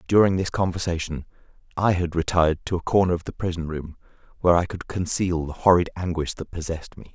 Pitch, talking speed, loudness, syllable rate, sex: 85 Hz, 195 wpm, -23 LUFS, 6.2 syllables/s, male